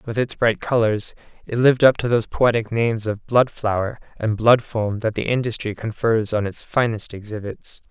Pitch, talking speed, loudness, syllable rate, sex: 110 Hz, 190 wpm, -20 LUFS, 5.1 syllables/s, male